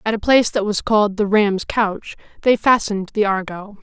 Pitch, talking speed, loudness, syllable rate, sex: 210 Hz, 205 wpm, -18 LUFS, 5.2 syllables/s, female